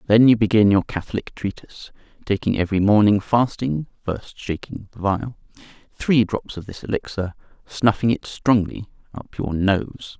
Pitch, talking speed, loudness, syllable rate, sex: 105 Hz, 145 wpm, -21 LUFS, 4.5 syllables/s, male